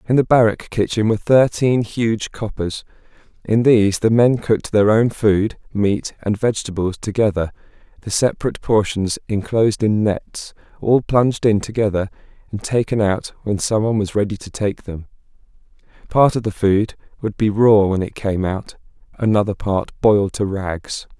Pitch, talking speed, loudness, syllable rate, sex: 105 Hz, 160 wpm, -18 LUFS, 4.9 syllables/s, male